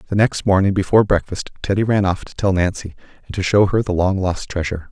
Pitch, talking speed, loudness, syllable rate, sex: 95 Hz, 230 wpm, -18 LUFS, 6.3 syllables/s, male